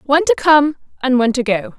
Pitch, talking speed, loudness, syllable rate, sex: 260 Hz, 235 wpm, -15 LUFS, 6.6 syllables/s, female